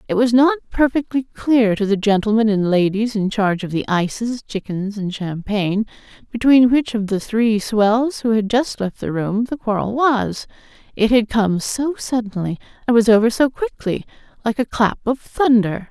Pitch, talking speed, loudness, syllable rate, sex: 225 Hz, 175 wpm, -18 LUFS, 4.7 syllables/s, female